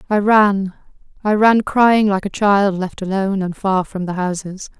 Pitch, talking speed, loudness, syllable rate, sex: 200 Hz, 175 wpm, -16 LUFS, 4.4 syllables/s, female